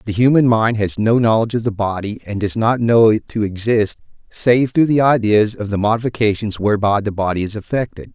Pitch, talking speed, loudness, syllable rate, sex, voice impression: 110 Hz, 205 wpm, -16 LUFS, 5.6 syllables/s, male, masculine, middle-aged, thick, tensed, powerful, cool, intellectual, friendly, reassuring, wild, lively, kind